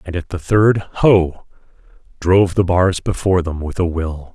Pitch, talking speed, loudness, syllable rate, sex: 90 Hz, 180 wpm, -17 LUFS, 4.5 syllables/s, male